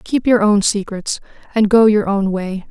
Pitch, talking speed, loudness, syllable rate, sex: 205 Hz, 200 wpm, -15 LUFS, 4.4 syllables/s, female